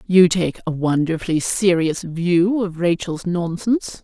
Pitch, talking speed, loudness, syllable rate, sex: 175 Hz, 135 wpm, -19 LUFS, 4.2 syllables/s, female